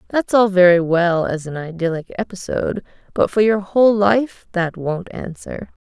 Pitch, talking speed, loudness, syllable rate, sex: 190 Hz, 165 wpm, -18 LUFS, 4.7 syllables/s, female